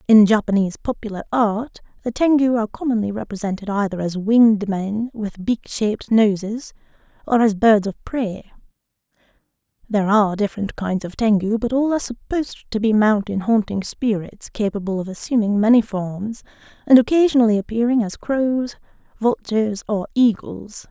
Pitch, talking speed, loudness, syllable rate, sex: 220 Hz, 145 wpm, -19 LUFS, 5.3 syllables/s, female